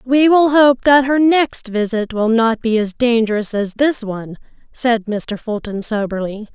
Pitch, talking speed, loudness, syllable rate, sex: 235 Hz, 175 wpm, -16 LUFS, 4.3 syllables/s, female